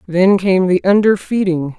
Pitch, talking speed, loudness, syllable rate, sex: 190 Hz, 135 wpm, -14 LUFS, 4.2 syllables/s, female